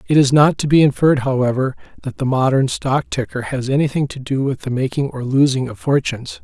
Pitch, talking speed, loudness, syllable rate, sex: 135 Hz, 215 wpm, -17 LUFS, 5.9 syllables/s, male